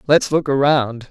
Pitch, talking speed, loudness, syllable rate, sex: 135 Hz, 160 wpm, -17 LUFS, 4.1 syllables/s, male